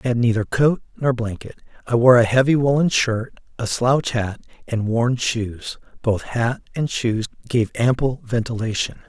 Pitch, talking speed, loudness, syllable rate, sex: 120 Hz, 165 wpm, -20 LUFS, 4.5 syllables/s, male